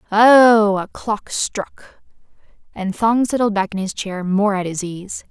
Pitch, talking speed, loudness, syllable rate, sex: 205 Hz, 170 wpm, -17 LUFS, 3.7 syllables/s, female